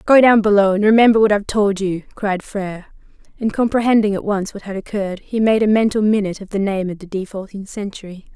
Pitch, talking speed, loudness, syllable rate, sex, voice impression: 205 Hz, 215 wpm, -17 LUFS, 6.1 syllables/s, female, feminine, slightly young, slightly relaxed, powerful, soft, raspy, slightly refreshing, friendly, slightly reassuring, elegant, lively, slightly modest